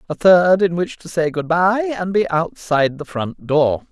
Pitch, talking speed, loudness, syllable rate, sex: 170 Hz, 215 wpm, -17 LUFS, 4.6 syllables/s, male